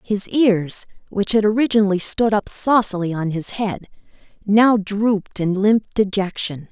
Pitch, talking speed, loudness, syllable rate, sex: 205 Hz, 145 wpm, -19 LUFS, 4.3 syllables/s, female